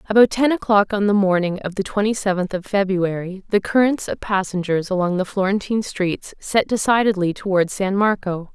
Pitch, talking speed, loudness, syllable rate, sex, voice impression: 195 Hz, 175 wpm, -20 LUFS, 5.3 syllables/s, female, very feminine, slightly young, slightly adult-like, slightly tensed, slightly weak, bright, slightly hard, clear, fluent, very cute, slightly cool, very intellectual, refreshing, very sincere, slightly calm, friendly, very reassuring, unique, very elegant, very sweet, slightly lively, kind